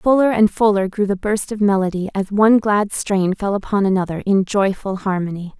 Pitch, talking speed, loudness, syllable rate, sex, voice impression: 200 Hz, 195 wpm, -18 LUFS, 5.3 syllables/s, female, feminine, adult-like, slightly relaxed, powerful, soft, slightly muffled, fluent, refreshing, calm, friendly, reassuring, elegant, slightly lively, kind, modest